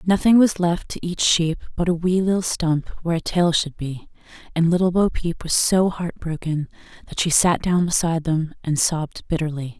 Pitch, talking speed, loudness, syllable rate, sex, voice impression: 170 Hz, 200 wpm, -21 LUFS, 5.1 syllables/s, female, feminine, adult-like, slightly dark, slightly intellectual, calm